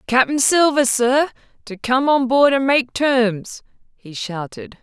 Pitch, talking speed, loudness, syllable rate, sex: 255 Hz, 150 wpm, -17 LUFS, 3.5 syllables/s, female